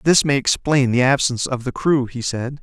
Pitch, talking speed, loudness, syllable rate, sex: 130 Hz, 230 wpm, -18 LUFS, 5.2 syllables/s, male